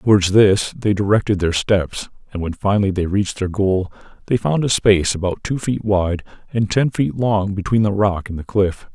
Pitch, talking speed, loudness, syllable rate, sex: 100 Hz, 210 wpm, -18 LUFS, 5.0 syllables/s, male